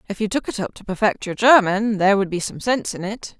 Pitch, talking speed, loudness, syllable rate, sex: 205 Hz, 285 wpm, -20 LUFS, 6.2 syllables/s, female